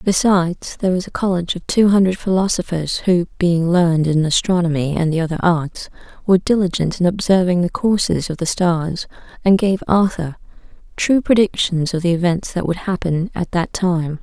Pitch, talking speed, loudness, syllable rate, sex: 175 Hz, 175 wpm, -17 LUFS, 5.2 syllables/s, female